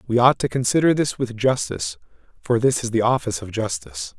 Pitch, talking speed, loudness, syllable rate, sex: 125 Hz, 200 wpm, -21 LUFS, 6.1 syllables/s, male